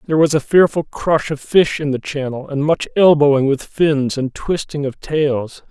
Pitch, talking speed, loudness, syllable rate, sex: 145 Hz, 200 wpm, -17 LUFS, 4.6 syllables/s, male